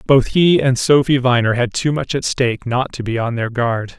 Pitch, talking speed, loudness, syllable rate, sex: 125 Hz, 240 wpm, -16 LUFS, 5.0 syllables/s, male